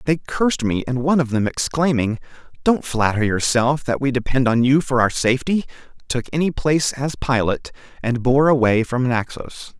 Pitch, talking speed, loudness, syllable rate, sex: 130 Hz, 180 wpm, -19 LUFS, 5.1 syllables/s, male